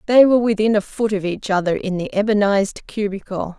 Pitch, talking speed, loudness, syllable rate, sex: 205 Hz, 200 wpm, -19 LUFS, 6.0 syllables/s, female